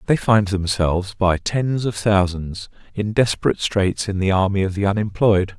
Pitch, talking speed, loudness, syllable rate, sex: 100 Hz, 170 wpm, -19 LUFS, 4.9 syllables/s, male